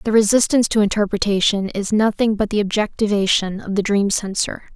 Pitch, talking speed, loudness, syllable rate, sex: 205 Hz, 165 wpm, -18 LUFS, 5.7 syllables/s, female